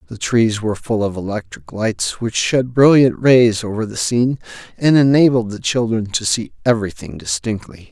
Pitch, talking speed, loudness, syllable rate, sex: 110 Hz, 165 wpm, -17 LUFS, 5.0 syllables/s, male